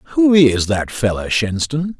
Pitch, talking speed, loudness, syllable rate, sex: 130 Hz, 150 wpm, -16 LUFS, 4.1 syllables/s, male